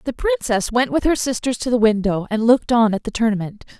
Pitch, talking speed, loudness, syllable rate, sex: 240 Hz, 235 wpm, -19 LUFS, 6.0 syllables/s, female